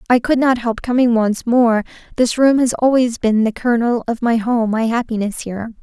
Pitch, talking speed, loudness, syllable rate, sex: 235 Hz, 205 wpm, -16 LUFS, 5.1 syllables/s, female